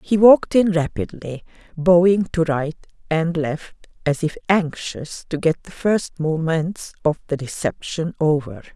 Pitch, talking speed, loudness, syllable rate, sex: 165 Hz, 145 wpm, -20 LUFS, 4.1 syllables/s, female